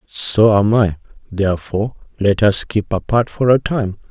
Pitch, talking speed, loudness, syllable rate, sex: 105 Hz, 160 wpm, -16 LUFS, 4.5 syllables/s, male